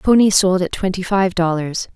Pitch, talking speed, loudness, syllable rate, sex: 185 Hz, 185 wpm, -17 LUFS, 4.8 syllables/s, female